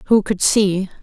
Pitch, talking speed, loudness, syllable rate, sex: 200 Hz, 175 wpm, -16 LUFS, 4.2 syllables/s, female